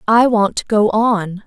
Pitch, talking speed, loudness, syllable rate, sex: 215 Hz, 205 wpm, -15 LUFS, 3.8 syllables/s, female